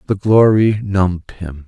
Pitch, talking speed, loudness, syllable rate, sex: 100 Hz, 145 wpm, -14 LUFS, 4.6 syllables/s, male